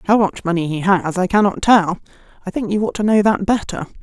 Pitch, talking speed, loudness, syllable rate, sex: 195 Hz, 240 wpm, -17 LUFS, 5.8 syllables/s, female